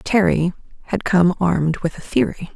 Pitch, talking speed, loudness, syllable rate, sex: 180 Hz, 165 wpm, -19 LUFS, 4.8 syllables/s, female